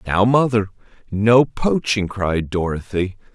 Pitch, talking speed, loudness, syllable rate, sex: 105 Hz, 110 wpm, -19 LUFS, 3.8 syllables/s, male